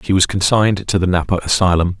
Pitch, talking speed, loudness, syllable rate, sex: 90 Hz, 210 wpm, -15 LUFS, 6.5 syllables/s, male